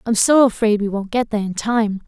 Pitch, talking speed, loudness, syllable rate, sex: 215 Hz, 260 wpm, -18 LUFS, 5.7 syllables/s, female